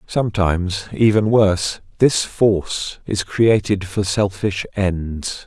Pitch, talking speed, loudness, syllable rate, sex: 100 Hz, 110 wpm, -18 LUFS, 3.7 syllables/s, male